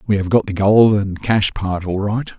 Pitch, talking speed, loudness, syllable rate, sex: 100 Hz, 250 wpm, -17 LUFS, 4.5 syllables/s, male